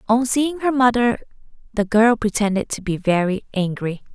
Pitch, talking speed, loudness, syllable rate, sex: 220 Hz, 160 wpm, -19 LUFS, 4.9 syllables/s, female